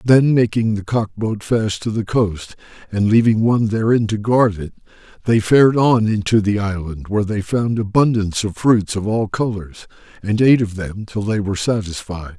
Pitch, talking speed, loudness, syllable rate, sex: 105 Hz, 190 wpm, -17 LUFS, 5.0 syllables/s, male